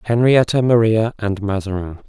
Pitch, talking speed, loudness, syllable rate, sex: 110 Hz, 115 wpm, -17 LUFS, 4.8 syllables/s, male